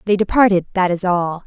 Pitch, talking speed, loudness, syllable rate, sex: 190 Hz, 205 wpm, -16 LUFS, 5.7 syllables/s, female